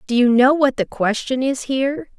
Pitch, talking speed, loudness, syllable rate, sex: 260 Hz, 220 wpm, -18 LUFS, 5.1 syllables/s, female